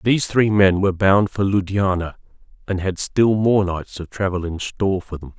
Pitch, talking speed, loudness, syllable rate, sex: 95 Hz, 200 wpm, -19 LUFS, 5.1 syllables/s, male